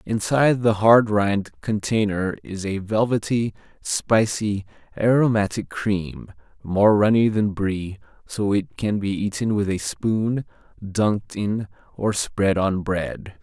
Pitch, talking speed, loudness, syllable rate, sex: 105 Hz, 130 wpm, -22 LUFS, 3.7 syllables/s, male